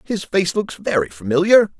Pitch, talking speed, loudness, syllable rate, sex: 175 Hz, 170 wpm, -18 LUFS, 4.9 syllables/s, male